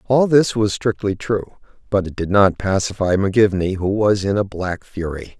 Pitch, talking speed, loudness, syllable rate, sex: 100 Hz, 190 wpm, -19 LUFS, 4.9 syllables/s, male